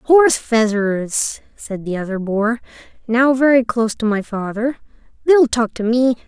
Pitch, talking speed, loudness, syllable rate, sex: 235 Hz, 145 wpm, -17 LUFS, 4.8 syllables/s, female